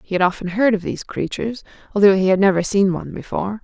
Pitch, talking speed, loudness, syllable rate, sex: 195 Hz, 230 wpm, -19 LUFS, 7.1 syllables/s, female